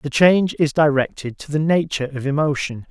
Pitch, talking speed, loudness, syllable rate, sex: 145 Hz, 185 wpm, -19 LUFS, 5.7 syllables/s, male